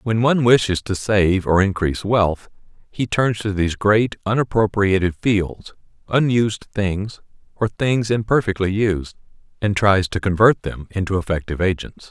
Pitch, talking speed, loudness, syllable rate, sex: 100 Hz, 145 wpm, -19 LUFS, 4.8 syllables/s, male